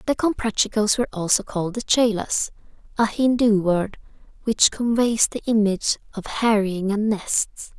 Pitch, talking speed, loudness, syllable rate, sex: 215 Hz, 140 wpm, -21 LUFS, 4.9 syllables/s, female